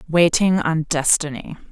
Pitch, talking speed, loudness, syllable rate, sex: 160 Hz, 105 wpm, -18 LUFS, 4.2 syllables/s, female